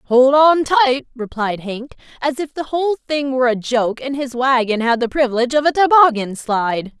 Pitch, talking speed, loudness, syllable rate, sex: 260 Hz, 195 wpm, -16 LUFS, 5.1 syllables/s, female